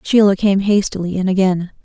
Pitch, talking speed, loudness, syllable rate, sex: 190 Hz, 165 wpm, -16 LUFS, 5.5 syllables/s, female